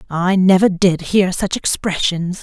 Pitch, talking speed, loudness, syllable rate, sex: 185 Hz, 150 wpm, -16 LUFS, 4.0 syllables/s, female